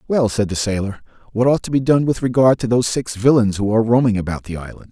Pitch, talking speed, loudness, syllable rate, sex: 115 Hz, 255 wpm, -17 LUFS, 6.5 syllables/s, male